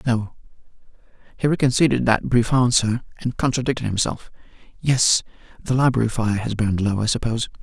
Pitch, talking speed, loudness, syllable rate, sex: 115 Hz, 135 wpm, -20 LUFS, 5.9 syllables/s, male